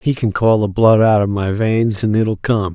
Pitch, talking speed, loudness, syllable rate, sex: 105 Hz, 260 wpm, -15 LUFS, 4.4 syllables/s, male